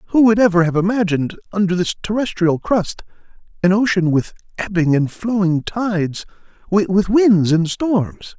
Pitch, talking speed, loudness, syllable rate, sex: 190 Hz, 145 wpm, -17 LUFS, 4.6 syllables/s, male